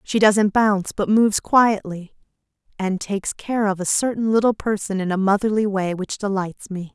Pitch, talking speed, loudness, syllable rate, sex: 205 Hz, 180 wpm, -20 LUFS, 5.0 syllables/s, female